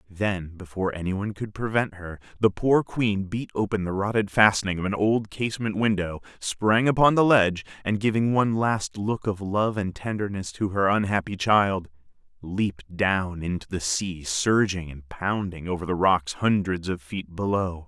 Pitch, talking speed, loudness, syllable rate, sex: 100 Hz, 170 wpm, -25 LUFS, 4.7 syllables/s, male